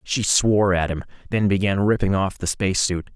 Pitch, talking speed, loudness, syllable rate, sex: 100 Hz, 190 wpm, -21 LUFS, 5.6 syllables/s, male